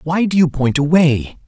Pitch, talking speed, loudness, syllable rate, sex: 155 Hz, 205 wpm, -15 LUFS, 4.6 syllables/s, male